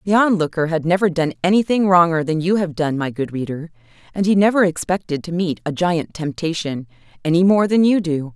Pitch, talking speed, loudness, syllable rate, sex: 170 Hz, 200 wpm, -18 LUFS, 5.6 syllables/s, female